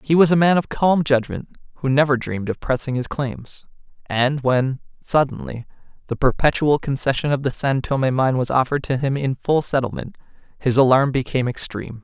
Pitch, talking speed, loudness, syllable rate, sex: 135 Hz, 180 wpm, -20 LUFS, 5.4 syllables/s, male